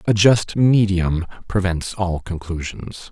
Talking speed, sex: 115 wpm, male